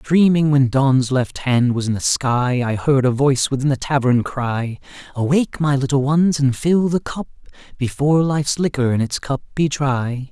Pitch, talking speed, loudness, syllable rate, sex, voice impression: 135 Hz, 190 wpm, -18 LUFS, 4.7 syllables/s, male, masculine, adult-like, tensed, powerful, soft, clear, raspy, cool, intellectual, friendly, lively, kind, slightly intense, slightly modest